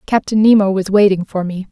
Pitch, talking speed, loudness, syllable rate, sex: 200 Hz, 210 wpm, -14 LUFS, 5.7 syllables/s, female